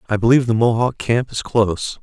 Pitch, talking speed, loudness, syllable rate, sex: 115 Hz, 205 wpm, -17 LUFS, 6.0 syllables/s, male